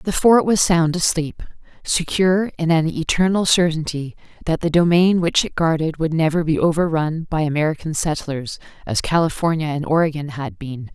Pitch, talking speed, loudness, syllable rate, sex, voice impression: 160 Hz, 160 wpm, -19 LUFS, 5.0 syllables/s, female, very feminine, adult-like, thin, tensed, slightly weak, slightly bright, soft, clear, fluent, cute, intellectual, refreshing, very sincere, calm, very friendly, very reassuring, slightly unique, elegant, slightly wild, sweet, lively, kind, slightly modest, slightly light